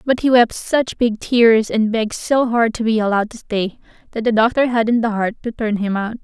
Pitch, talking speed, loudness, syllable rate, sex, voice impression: 225 Hz, 240 wpm, -17 LUFS, 5.0 syllables/s, female, feminine, slightly young, tensed, slightly powerful, slightly soft, calm, friendly, reassuring, slightly kind